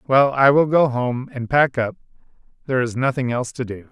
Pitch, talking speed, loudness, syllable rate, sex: 130 Hz, 200 wpm, -19 LUFS, 5.6 syllables/s, male